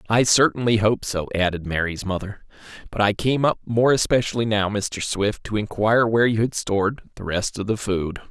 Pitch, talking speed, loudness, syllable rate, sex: 105 Hz, 195 wpm, -21 LUFS, 5.3 syllables/s, male